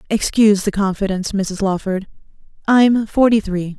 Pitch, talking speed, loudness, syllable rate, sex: 205 Hz, 125 wpm, -17 LUFS, 5.0 syllables/s, female